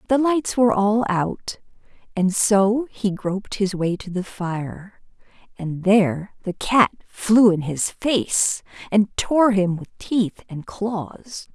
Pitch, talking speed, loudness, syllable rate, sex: 205 Hz, 150 wpm, -21 LUFS, 3.4 syllables/s, female